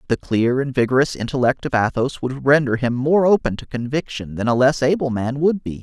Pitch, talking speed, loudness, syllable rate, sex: 130 Hz, 215 wpm, -19 LUFS, 5.5 syllables/s, male